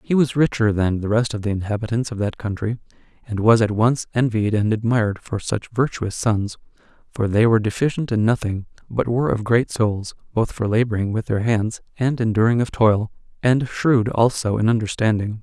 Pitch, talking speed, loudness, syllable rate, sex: 110 Hz, 190 wpm, -20 LUFS, 5.3 syllables/s, male